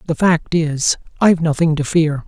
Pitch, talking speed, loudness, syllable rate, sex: 160 Hz, 185 wpm, -16 LUFS, 4.8 syllables/s, male